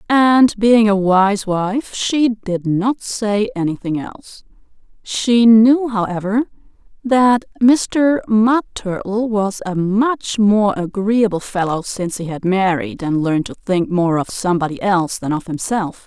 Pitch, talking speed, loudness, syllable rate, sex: 205 Hz, 145 wpm, -16 LUFS, 4.0 syllables/s, female